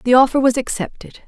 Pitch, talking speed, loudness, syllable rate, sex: 250 Hz, 190 wpm, -16 LUFS, 6.1 syllables/s, female